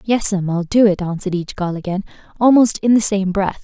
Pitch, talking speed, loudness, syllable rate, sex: 200 Hz, 215 wpm, -17 LUFS, 5.9 syllables/s, female